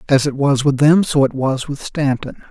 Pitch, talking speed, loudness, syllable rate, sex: 140 Hz, 240 wpm, -16 LUFS, 5.0 syllables/s, male